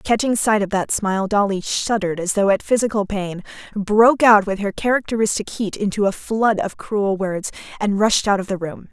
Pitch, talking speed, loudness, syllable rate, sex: 205 Hz, 200 wpm, -19 LUFS, 5.2 syllables/s, female